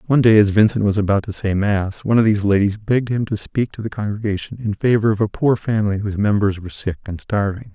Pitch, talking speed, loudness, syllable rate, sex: 105 Hz, 250 wpm, -18 LUFS, 6.6 syllables/s, male